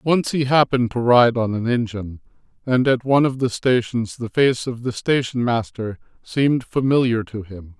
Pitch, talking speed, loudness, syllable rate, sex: 120 Hz, 185 wpm, -20 LUFS, 5.0 syllables/s, male